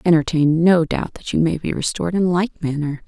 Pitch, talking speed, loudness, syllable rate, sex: 165 Hz, 235 wpm, -19 LUFS, 5.8 syllables/s, female